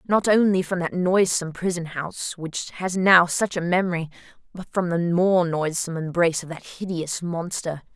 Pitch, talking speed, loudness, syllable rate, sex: 175 Hz, 175 wpm, -23 LUFS, 5.0 syllables/s, female